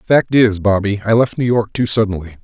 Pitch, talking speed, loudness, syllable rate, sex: 105 Hz, 220 wpm, -15 LUFS, 5.2 syllables/s, male